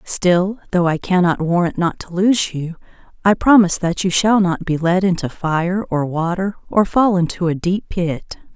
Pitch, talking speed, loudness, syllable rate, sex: 180 Hz, 190 wpm, -17 LUFS, 4.6 syllables/s, female